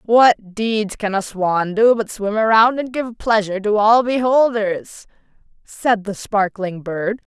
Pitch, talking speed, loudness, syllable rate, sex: 215 Hz, 155 wpm, -18 LUFS, 3.8 syllables/s, female